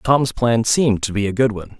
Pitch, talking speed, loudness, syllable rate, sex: 115 Hz, 270 wpm, -18 LUFS, 5.7 syllables/s, male